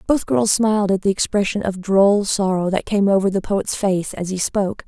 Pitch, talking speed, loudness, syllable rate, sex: 195 Hz, 220 wpm, -19 LUFS, 5.1 syllables/s, female